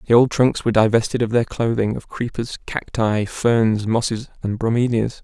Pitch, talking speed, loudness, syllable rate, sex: 115 Hz, 170 wpm, -20 LUFS, 4.9 syllables/s, male